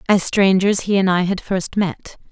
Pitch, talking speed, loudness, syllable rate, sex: 190 Hz, 210 wpm, -17 LUFS, 4.4 syllables/s, female